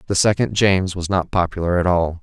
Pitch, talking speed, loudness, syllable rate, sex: 90 Hz, 215 wpm, -19 LUFS, 5.9 syllables/s, male